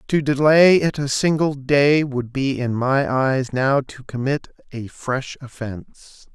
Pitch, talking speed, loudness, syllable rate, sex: 135 Hz, 160 wpm, -19 LUFS, 3.7 syllables/s, male